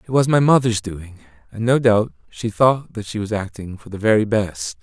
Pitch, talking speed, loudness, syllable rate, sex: 105 Hz, 225 wpm, -19 LUFS, 4.9 syllables/s, male